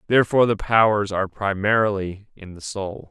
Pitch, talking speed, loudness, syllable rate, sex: 105 Hz, 155 wpm, -20 LUFS, 5.6 syllables/s, male